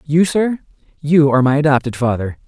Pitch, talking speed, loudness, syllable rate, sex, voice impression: 145 Hz, 145 wpm, -15 LUFS, 6.0 syllables/s, male, masculine, adult-like, tensed, powerful, bright, clear, fluent, intellectual, calm, friendly, reassuring, lively, slightly kind, slightly modest